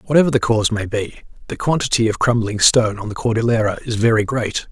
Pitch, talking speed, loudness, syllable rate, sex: 115 Hz, 205 wpm, -18 LUFS, 6.4 syllables/s, male